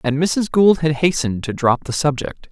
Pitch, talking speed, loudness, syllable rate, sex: 150 Hz, 215 wpm, -18 LUFS, 5.1 syllables/s, male